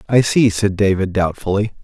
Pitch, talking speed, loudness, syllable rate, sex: 100 Hz, 165 wpm, -16 LUFS, 5.0 syllables/s, male